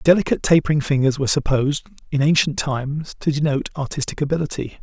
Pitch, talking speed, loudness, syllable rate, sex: 145 Hz, 150 wpm, -20 LUFS, 6.9 syllables/s, male